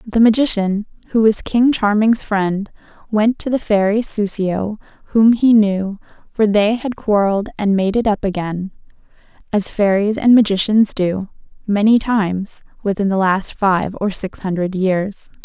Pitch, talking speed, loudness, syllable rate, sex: 205 Hz, 150 wpm, -17 LUFS, 4.3 syllables/s, female